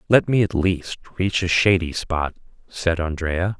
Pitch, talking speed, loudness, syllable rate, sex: 90 Hz, 165 wpm, -21 LUFS, 4.1 syllables/s, male